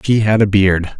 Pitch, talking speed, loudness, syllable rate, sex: 100 Hz, 240 wpm, -13 LUFS, 4.5 syllables/s, male